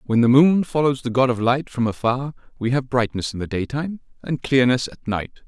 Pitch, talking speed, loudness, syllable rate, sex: 130 Hz, 220 wpm, -21 LUFS, 5.4 syllables/s, male